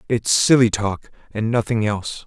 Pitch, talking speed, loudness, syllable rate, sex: 110 Hz, 160 wpm, -19 LUFS, 4.7 syllables/s, male